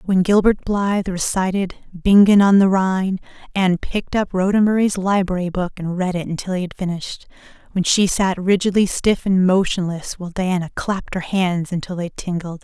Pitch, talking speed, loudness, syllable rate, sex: 185 Hz, 175 wpm, -19 LUFS, 5.4 syllables/s, female